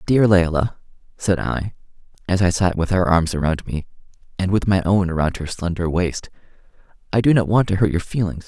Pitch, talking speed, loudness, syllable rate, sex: 90 Hz, 200 wpm, -20 LUFS, 5.4 syllables/s, male